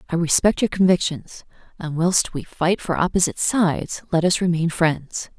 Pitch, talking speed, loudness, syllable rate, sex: 170 Hz, 165 wpm, -20 LUFS, 4.8 syllables/s, female